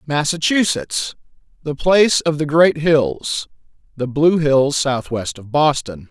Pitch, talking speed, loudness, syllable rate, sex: 150 Hz, 120 wpm, -17 LUFS, 2.8 syllables/s, male